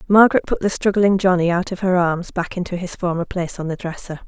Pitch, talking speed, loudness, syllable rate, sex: 180 Hz, 240 wpm, -19 LUFS, 6.2 syllables/s, female